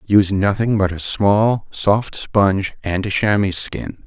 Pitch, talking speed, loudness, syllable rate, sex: 100 Hz, 160 wpm, -18 LUFS, 3.9 syllables/s, male